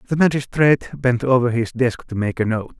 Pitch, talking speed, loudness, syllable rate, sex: 125 Hz, 215 wpm, -19 LUFS, 5.5 syllables/s, male